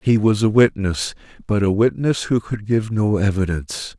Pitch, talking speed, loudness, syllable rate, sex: 105 Hz, 180 wpm, -19 LUFS, 4.8 syllables/s, male